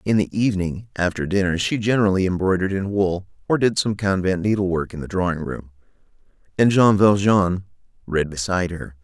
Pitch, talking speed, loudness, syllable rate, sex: 95 Hz, 165 wpm, -20 LUFS, 5.7 syllables/s, male